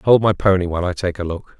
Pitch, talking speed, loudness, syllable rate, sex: 95 Hz, 300 wpm, -18 LUFS, 6.5 syllables/s, male